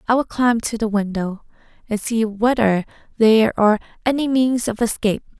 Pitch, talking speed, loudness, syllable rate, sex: 225 Hz, 165 wpm, -19 LUFS, 5.3 syllables/s, female